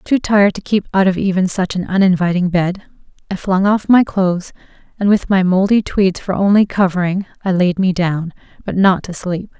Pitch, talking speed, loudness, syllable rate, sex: 190 Hz, 200 wpm, -15 LUFS, 5.2 syllables/s, female